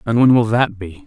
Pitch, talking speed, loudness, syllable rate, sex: 110 Hz, 280 wpm, -15 LUFS, 5.3 syllables/s, male